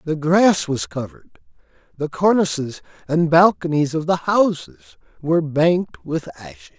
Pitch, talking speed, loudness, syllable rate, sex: 160 Hz, 135 wpm, -19 LUFS, 4.6 syllables/s, male